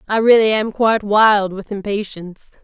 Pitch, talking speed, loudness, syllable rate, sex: 210 Hz, 160 wpm, -15 LUFS, 5.0 syllables/s, female